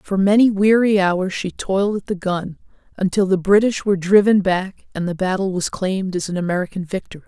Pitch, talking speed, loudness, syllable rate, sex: 190 Hz, 200 wpm, -18 LUFS, 5.6 syllables/s, female